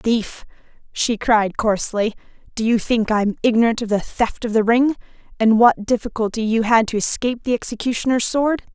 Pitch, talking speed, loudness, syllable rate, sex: 230 Hz, 180 wpm, -19 LUFS, 5.4 syllables/s, female